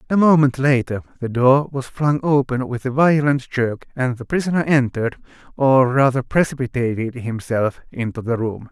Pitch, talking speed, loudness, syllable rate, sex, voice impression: 130 Hz, 160 wpm, -19 LUFS, 4.9 syllables/s, male, very masculine, very adult-like, old, thick, tensed, slightly powerful, slightly bright, slightly soft, slightly muffled, fluent, cool, intellectual, very sincere, very calm, mature, friendly, reassuring, slightly unique, very elegant, slightly sweet, lively, very kind, slightly modest